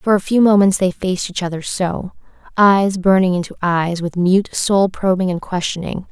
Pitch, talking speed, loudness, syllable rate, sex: 185 Hz, 185 wpm, -16 LUFS, 4.9 syllables/s, female